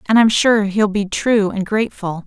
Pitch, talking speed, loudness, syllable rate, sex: 205 Hz, 210 wpm, -16 LUFS, 4.8 syllables/s, female